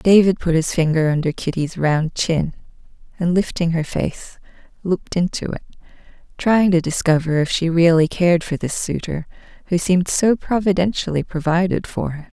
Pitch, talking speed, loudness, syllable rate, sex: 170 Hz, 155 wpm, -19 LUFS, 5.1 syllables/s, female